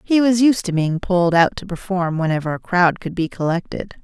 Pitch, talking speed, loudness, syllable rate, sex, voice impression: 185 Hz, 225 wpm, -18 LUFS, 5.4 syllables/s, female, feminine, adult-like, sincere, slightly elegant, slightly kind